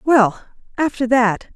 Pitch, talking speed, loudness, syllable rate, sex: 245 Hz, 115 wpm, -17 LUFS, 3.6 syllables/s, female